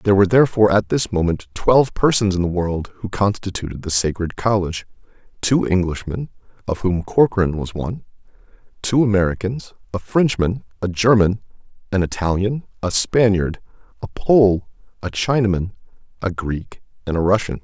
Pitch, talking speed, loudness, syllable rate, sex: 100 Hz, 140 wpm, -19 LUFS, 5.3 syllables/s, male